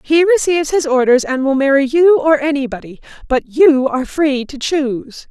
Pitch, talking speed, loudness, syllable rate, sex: 285 Hz, 180 wpm, -14 LUFS, 5.1 syllables/s, female